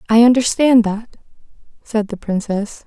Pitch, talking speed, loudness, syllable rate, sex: 220 Hz, 125 wpm, -16 LUFS, 4.4 syllables/s, female